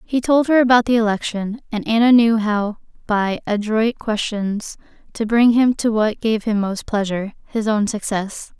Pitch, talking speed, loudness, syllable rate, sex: 220 Hz, 170 wpm, -18 LUFS, 4.5 syllables/s, female